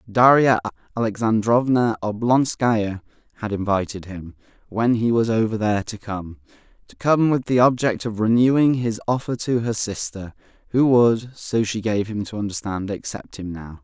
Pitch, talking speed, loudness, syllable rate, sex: 110 Hz, 155 wpm, -21 LUFS, 4.8 syllables/s, male